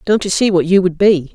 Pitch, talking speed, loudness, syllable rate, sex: 185 Hz, 315 wpm, -13 LUFS, 5.7 syllables/s, female